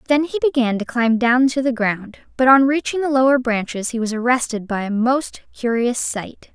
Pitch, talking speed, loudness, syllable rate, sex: 245 Hz, 210 wpm, -18 LUFS, 5.0 syllables/s, female